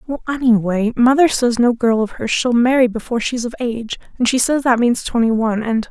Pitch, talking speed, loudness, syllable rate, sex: 240 Hz, 225 wpm, -16 LUFS, 5.8 syllables/s, female